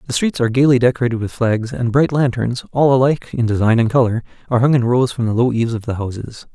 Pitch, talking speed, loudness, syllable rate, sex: 120 Hz, 230 wpm, -17 LUFS, 6.7 syllables/s, male